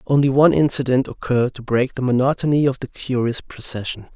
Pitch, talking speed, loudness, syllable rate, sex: 130 Hz, 175 wpm, -19 LUFS, 6.0 syllables/s, male